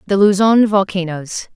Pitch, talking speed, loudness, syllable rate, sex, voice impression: 195 Hz, 115 wpm, -15 LUFS, 4.6 syllables/s, female, very feminine, young, very thin, tensed, powerful, slightly bright, very hard, very clear, fluent, cute, intellectual, very refreshing, sincere, calm, very friendly, very reassuring, very unique, slightly elegant, wild, lively, strict, slightly intense, slightly sharp